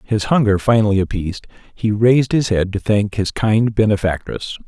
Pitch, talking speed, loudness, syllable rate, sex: 105 Hz, 165 wpm, -17 LUFS, 5.2 syllables/s, male